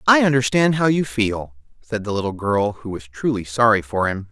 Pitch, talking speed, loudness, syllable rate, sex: 115 Hz, 210 wpm, -20 LUFS, 5.1 syllables/s, male